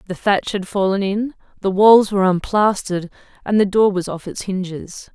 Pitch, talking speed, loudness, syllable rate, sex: 195 Hz, 185 wpm, -18 LUFS, 5.1 syllables/s, female